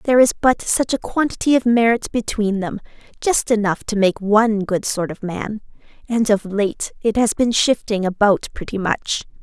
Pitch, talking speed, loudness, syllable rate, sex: 215 Hz, 185 wpm, -19 LUFS, 4.8 syllables/s, female